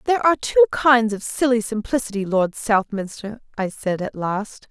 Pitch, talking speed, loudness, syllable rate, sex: 225 Hz, 165 wpm, -20 LUFS, 4.9 syllables/s, female